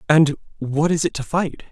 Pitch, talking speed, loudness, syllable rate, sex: 150 Hz, 210 wpm, -20 LUFS, 5.2 syllables/s, male